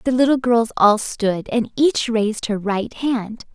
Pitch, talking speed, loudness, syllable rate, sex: 230 Hz, 185 wpm, -19 LUFS, 4.0 syllables/s, female